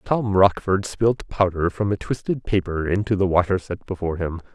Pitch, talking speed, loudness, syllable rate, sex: 95 Hz, 185 wpm, -22 LUFS, 5.1 syllables/s, male